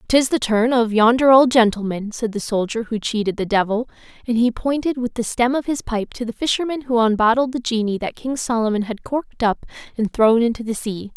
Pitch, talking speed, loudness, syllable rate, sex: 235 Hz, 220 wpm, -19 LUFS, 5.6 syllables/s, female